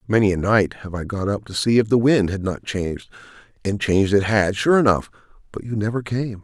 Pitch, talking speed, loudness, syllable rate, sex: 105 Hz, 235 wpm, -20 LUFS, 5.7 syllables/s, male